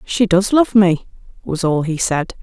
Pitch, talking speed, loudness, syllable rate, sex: 185 Hz, 200 wpm, -16 LUFS, 4.2 syllables/s, female